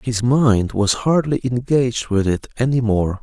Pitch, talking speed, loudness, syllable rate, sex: 120 Hz, 170 wpm, -18 LUFS, 4.3 syllables/s, male